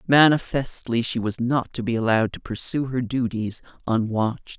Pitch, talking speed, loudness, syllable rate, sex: 120 Hz, 155 wpm, -23 LUFS, 5.0 syllables/s, female